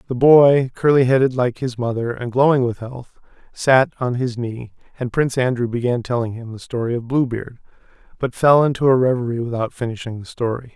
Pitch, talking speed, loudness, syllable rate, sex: 125 Hz, 190 wpm, -18 LUFS, 5.5 syllables/s, male